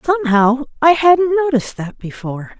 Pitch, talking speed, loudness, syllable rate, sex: 275 Hz, 140 wpm, -14 LUFS, 5.2 syllables/s, female